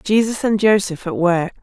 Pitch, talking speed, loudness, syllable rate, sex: 195 Hz, 185 wpm, -17 LUFS, 4.6 syllables/s, female